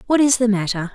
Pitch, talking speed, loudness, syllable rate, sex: 225 Hz, 255 wpm, -18 LUFS, 6.3 syllables/s, female